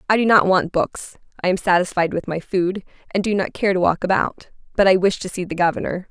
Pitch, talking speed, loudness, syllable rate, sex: 185 Hz, 245 wpm, -19 LUFS, 5.9 syllables/s, female